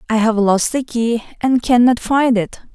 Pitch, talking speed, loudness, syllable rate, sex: 235 Hz, 195 wpm, -16 LUFS, 4.3 syllables/s, female